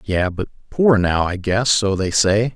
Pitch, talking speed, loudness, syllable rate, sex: 105 Hz, 210 wpm, -17 LUFS, 4.1 syllables/s, male